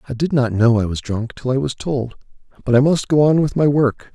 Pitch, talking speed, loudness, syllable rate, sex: 130 Hz, 275 wpm, -17 LUFS, 5.5 syllables/s, male